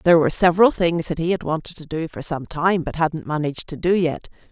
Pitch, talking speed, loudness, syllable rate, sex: 165 Hz, 255 wpm, -21 LUFS, 6.2 syllables/s, female